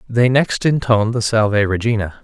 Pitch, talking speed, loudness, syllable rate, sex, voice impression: 115 Hz, 160 wpm, -16 LUFS, 5.3 syllables/s, male, masculine, adult-like, slightly calm, kind